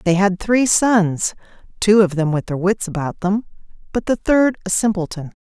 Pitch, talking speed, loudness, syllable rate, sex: 195 Hz, 190 wpm, -18 LUFS, 4.7 syllables/s, female